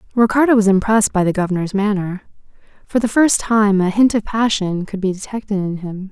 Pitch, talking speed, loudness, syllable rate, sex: 205 Hz, 195 wpm, -17 LUFS, 5.7 syllables/s, female